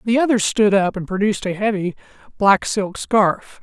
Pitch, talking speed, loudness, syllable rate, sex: 205 Hz, 180 wpm, -18 LUFS, 4.9 syllables/s, male